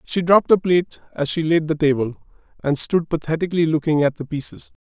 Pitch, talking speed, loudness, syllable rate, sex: 160 Hz, 195 wpm, -19 LUFS, 5.9 syllables/s, male